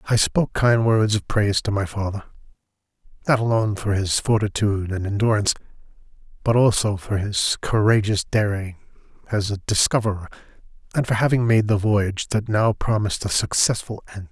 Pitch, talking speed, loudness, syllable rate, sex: 105 Hz, 155 wpm, -21 LUFS, 5.7 syllables/s, male